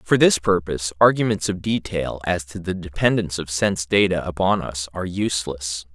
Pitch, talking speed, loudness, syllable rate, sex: 90 Hz, 170 wpm, -21 LUFS, 5.5 syllables/s, male